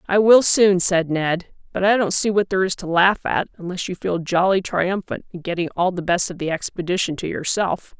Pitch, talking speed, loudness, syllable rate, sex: 180 Hz, 225 wpm, -20 LUFS, 5.2 syllables/s, female